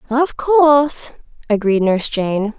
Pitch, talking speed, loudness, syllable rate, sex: 245 Hz, 115 wpm, -16 LUFS, 3.9 syllables/s, female